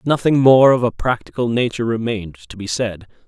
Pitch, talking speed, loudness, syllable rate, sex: 115 Hz, 185 wpm, -17 LUFS, 5.9 syllables/s, male